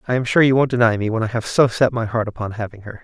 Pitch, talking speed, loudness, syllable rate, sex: 115 Hz, 335 wpm, -18 LUFS, 7.0 syllables/s, male